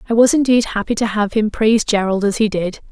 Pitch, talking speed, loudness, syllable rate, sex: 215 Hz, 245 wpm, -16 LUFS, 6.0 syllables/s, female